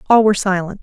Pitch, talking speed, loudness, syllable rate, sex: 200 Hz, 220 wpm, -15 LUFS, 7.9 syllables/s, female